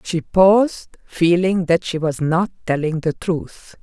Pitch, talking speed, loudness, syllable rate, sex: 170 Hz, 155 wpm, -18 LUFS, 3.8 syllables/s, female